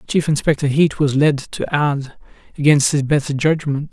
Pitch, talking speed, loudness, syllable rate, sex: 145 Hz, 170 wpm, -17 LUFS, 4.7 syllables/s, male